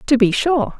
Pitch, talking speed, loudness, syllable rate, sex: 260 Hz, 225 wpm, -16 LUFS, 4.6 syllables/s, female